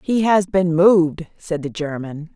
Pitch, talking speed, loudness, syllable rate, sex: 170 Hz, 180 wpm, -18 LUFS, 4.2 syllables/s, female